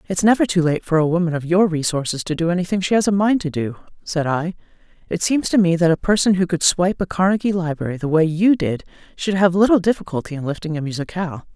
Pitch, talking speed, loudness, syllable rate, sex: 175 Hz, 240 wpm, -19 LUFS, 6.4 syllables/s, female